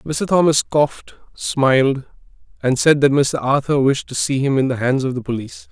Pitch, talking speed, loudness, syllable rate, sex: 140 Hz, 200 wpm, -17 LUFS, 5.0 syllables/s, male